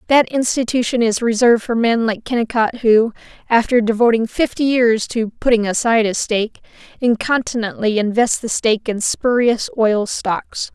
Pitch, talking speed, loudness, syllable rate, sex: 230 Hz, 145 wpm, -17 LUFS, 5.0 syllables/s, female